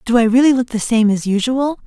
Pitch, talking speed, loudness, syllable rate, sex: 235 Hz, 260 wpm, -15 LUFS, 5.9 syllables/s, female